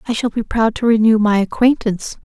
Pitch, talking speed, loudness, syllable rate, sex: 220 Hz, 210 wpm, -16 LUFS, 5.8 syllables/s, female